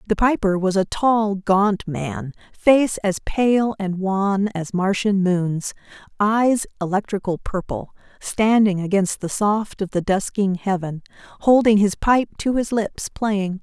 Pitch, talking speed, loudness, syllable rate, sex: 200 Hz, 145 wpm, -20 LUFS, 3.7 syllables/s, female